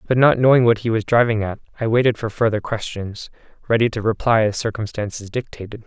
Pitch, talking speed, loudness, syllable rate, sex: 110 Hz, 195 wpm, -19 LUFS, 6.1 syllables/s, male